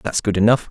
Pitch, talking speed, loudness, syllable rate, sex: 110 Hz, 255 wpm, -18 LUFS, 6.6 syllables/s, male